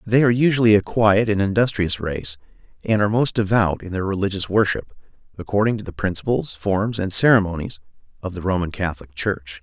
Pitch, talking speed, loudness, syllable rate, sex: 100 Hz, 175 wpm, -20 LUFS, 5.9 syllables/s, male